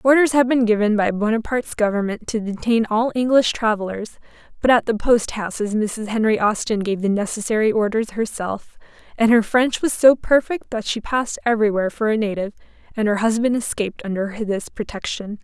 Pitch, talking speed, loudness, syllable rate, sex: 220 Hz, 175 wpm, -20 LUFS, 5.6 syllables/s, female